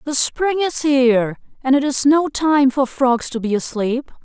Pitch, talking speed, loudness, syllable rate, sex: 270 Hz, 200 wpm, -17 LUFS, 4.2 syllables/s, female